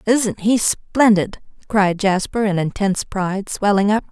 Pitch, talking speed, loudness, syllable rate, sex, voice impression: 200 Hz, 145 wpm, -18 LUFS, 4.4 syllables/s, female, feminine, adult-like, slightly weak, slightly soft, clear, fluent, intellectual, calm, elegant, slightly strict, slightly sharp